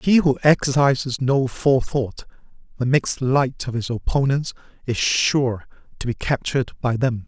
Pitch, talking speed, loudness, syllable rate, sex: 130 Hz, 150 wpm, -21 LUFS, 4.7 syllables/s, male